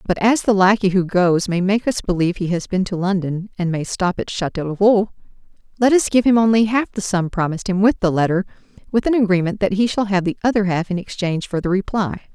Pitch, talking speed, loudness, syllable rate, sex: 195 Hz, 235 wpm, -18 LUFS, 6.0 syllables/s, female